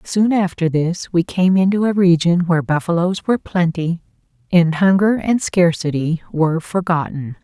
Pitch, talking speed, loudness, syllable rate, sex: 175 Hz, 145 wpm, -17 LUFS, 4.8 syllables/s, female